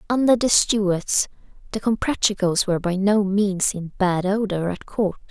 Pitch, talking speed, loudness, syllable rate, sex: 200 Hz, 160 wpm, -21 LUFS, 4.4 syllables/s, female